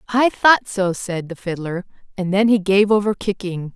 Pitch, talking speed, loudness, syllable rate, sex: 195 Hz, 190 wpm, -18 LUFS, 4.6 syllables/s, female